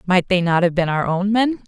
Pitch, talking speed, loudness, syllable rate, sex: 190 Hz, 285 wpm, -18 LUFS, 5.4 syllables/s, female